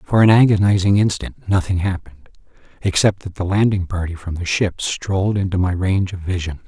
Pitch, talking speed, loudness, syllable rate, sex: 95 Hz, 180 wpm, -18 LUFS, 5.6 syllables/s, male